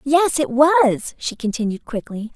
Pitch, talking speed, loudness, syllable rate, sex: 265 Hz, 155 wpm, -19 LUFS, 4.1 syllables/s, female